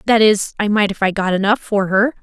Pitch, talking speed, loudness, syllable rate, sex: 205 Hz, 270 wpm, -16 LUFS, 5.5 syllables/s, female